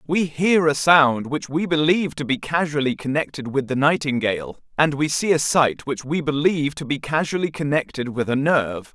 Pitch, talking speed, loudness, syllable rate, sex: 145 Hz, 195 wpm, -21 LUFS, 5.2 syllables/s, male